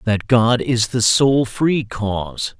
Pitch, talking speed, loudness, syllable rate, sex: 115 Hz, 160 wpm, -17 LUFS, 3.2 syllables/s, male